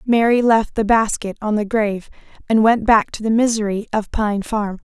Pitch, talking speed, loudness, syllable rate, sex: 215 Hz, 195 wpm, -18 LUFS, 5.0 syllables/s, female